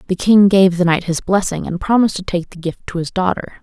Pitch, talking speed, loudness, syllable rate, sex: 180 Hz, 265 wpm, -16 LUFS, 5.8 syllables/s, female